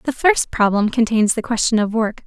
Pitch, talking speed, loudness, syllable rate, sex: 225 Hz, 210 wpm, -17 LUFS, 5.2 syllables/s, female